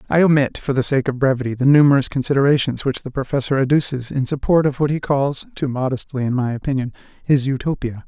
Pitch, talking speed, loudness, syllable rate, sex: 135 Hz, 200 wpm, -19 LUFS, 6.3 syllables/s, male